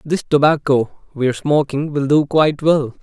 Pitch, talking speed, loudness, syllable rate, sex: 145 Hz, 160 wpm, -16 LUFS, 4.9 syllables/s, male